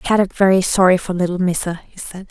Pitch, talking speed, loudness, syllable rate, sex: 185 Hz, 210 wpm, -16 LUFS, 5.9 syllables/s, female